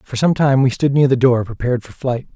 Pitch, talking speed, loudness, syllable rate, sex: 130 Hz, 280 wpm, -16 LUFS, 5.7 syllables/s, male